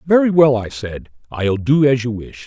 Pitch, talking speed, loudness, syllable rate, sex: 130 Hz, 220 wpm, -16 LUFS, 4.6 syllables/s, male